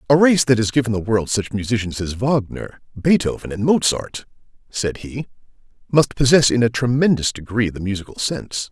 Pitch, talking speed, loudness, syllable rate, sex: 115 Hz, 170 wpm, -19 LUFS, 5.3 syllables/s, male